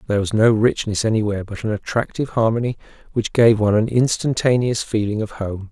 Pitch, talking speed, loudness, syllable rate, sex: 110 Hz, 180 wpm, -19 LUFS, 6.2 syllables/s, male